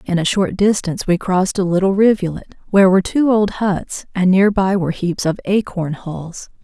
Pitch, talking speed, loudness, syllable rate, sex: 190 Hz, 200 wpm, -17 LUFS, 5.2 syllables/s, female